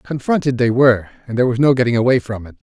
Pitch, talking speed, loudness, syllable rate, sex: 125 Hz, 245 wpm, -16 LUFS, 7.2 syllables/s, male